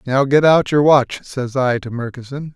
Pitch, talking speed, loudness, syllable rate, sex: 135 Hz, 210 wpm, -16 LUFS, 4.6 syllables/s, male